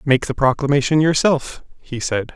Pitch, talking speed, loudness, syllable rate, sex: 140 Hz, 155 wpm, -18 LUFS, 4.7 syllables/s, male